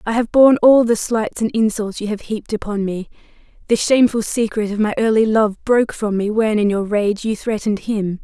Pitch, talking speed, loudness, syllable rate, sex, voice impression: 215 Hz, 220 wpm, -17 LUFS, 5.6 syllables/s, female, feminine, young, slightly adult-like, thin, tensed, slightly weak, slightly bright, very hard, very clear, slightly fluent, cute, slightly intellectual, refreshing, slightly sincere, calm, slightly friendly, slightly reassuring, slightly elegant, slightly strict, slightly modest